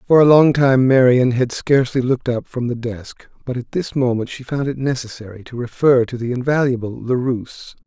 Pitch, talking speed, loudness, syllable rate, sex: 125 Hz, 200 wpm, -17 LUFS, 5.5 syllables/s, male